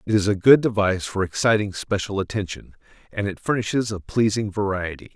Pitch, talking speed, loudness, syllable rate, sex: 100 Hz, 175 wpm, -22 LUFS, 5.8 syllables/s, male